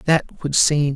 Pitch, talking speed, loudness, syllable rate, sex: 145 Hz, 190 wpm, -18 LUFS, 3.1 syllables/s, male